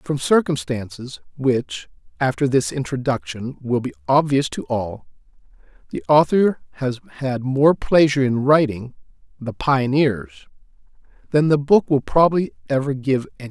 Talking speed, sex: 140 wpm, male